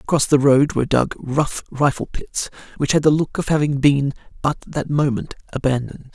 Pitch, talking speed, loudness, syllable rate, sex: 140 Hz, 185 wpm, -19 LUFS, 5.2 syllables/s, male